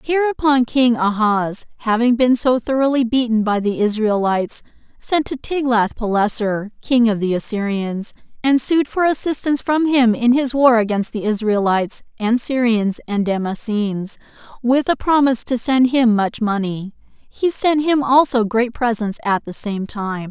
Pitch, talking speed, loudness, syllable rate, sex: 235 Hz, 155 wpm, -18 LUFS, 4.6 syllables/s, female